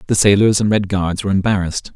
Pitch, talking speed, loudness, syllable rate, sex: 100 Hz, 215 wpm, -16 LUFS, 6.8 syllables/s, male